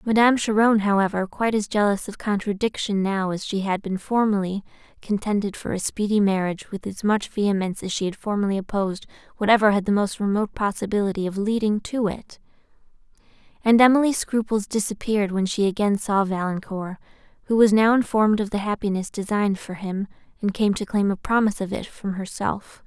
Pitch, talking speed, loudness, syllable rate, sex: 205 Hz, 175 wpm, -23 LUFS, 5.9 syllables/s, female